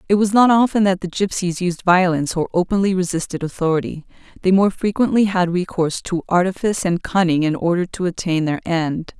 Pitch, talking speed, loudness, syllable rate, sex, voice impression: 180 Hz, 185 wpm, -18 LUFS, 5.8 syllables/s, female, feminine, adult-like, slightly middle-aged, slightly thin, tensed, powerful, slightly bright, hard, clear, fluent, cool, very intellectual, refreshing, very sincere, very calm, friendly, slightly reassuring, slightly unique, elegant, slightly wild, slightly sweet, slightly strict